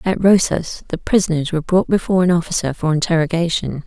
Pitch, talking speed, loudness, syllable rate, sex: 170 Hz, 170 wpm, -17 LUFS, 6.2 syllables/s, female